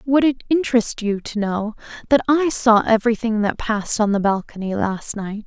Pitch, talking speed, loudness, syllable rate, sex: 225 Hz, 185 wpm, -19 LUFS, 5.2 syllables/s, female